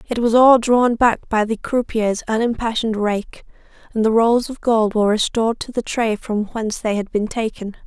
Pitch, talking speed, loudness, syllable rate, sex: 225 Hz, 200 wpm, -18 LUFS, 5.1 syllables/s, female